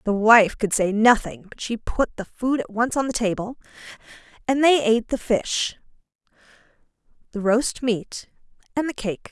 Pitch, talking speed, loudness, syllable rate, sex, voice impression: 230 Hz, 165 wpm, -21 LUFS, 4.9 syllables/s, female, feminine, adult-like, bright, clear, fluent, intellectual, elegant, slightly strict, sharp